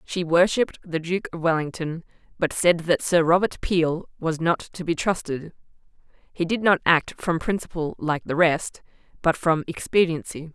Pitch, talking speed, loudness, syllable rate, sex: 170 Hz, 165 wpm, -23 LUFS, 4.7 syllables/s, female